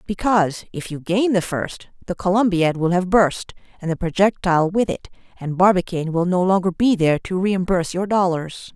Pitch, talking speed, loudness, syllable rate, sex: 185 Hz, 185 wpm, -19 LUFS, 5.4 syllables/s, female